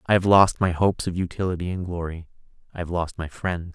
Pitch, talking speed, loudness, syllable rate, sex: 90 Hz, 225 wpm, -23 LUFS, 6.0 syllables/s, male